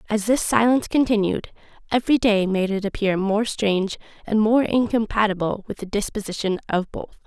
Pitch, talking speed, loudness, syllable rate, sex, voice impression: 210 Hz, 155 wpm, -21 LUFS, 5.5 syllables/s, female, feminine, adult-like, tensed, powerful, bright, clear, fluent, intellectual, friendly, lively, slightly intense